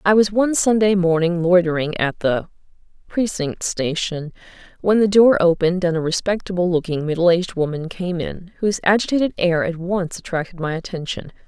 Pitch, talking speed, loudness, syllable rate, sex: 180 Hz, 160 wpm, -19 LUFS, 5.5 syllables/s, female